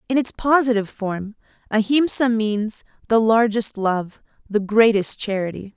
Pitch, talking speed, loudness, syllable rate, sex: 220 Hz, 125 wpm, -20 LUFS, 4.4 syllables/s, female